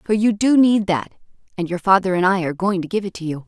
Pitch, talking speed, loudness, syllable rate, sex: 190 Hz, 295 wpm, -19 LUFS, 6.2 syllables/s, female